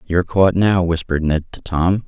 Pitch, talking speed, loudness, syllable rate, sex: 90 Hz, 200 wpm, -17 LUFS, 5.3 syllables/s, male